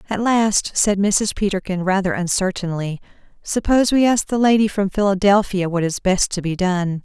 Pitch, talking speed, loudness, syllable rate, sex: 195 Hz, 170 wpm, -18 LUFS, 5.1 syllables/s, female